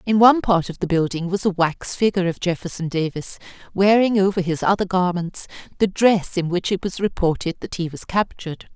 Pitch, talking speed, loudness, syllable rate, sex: 185 Hz, 200 wpm, -20 LUFS, 5.6 syllables/s, female